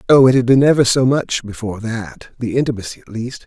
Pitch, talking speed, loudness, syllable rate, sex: 120 Hz, 210 wpm, -16 LUFS, 5.9 syllables/s, male